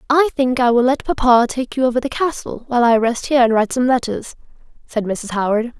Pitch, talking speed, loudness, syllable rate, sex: 245 Hz, 230 wpm, -17 LUFS, 6.1 syllables/s, female